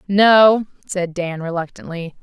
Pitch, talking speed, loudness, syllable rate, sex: 185 Hz, 110 wpm, -16 LUFS, 3.8 syllables/s, female